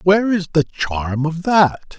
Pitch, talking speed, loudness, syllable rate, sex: 170 Hz, 180 wpm, -18 LUFS, 3.8 syllables/s, male